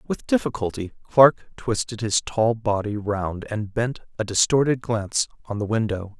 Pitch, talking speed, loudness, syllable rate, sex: 110 Hz, 155 wpm, -23 LUFS, 4.4 syllables/s, male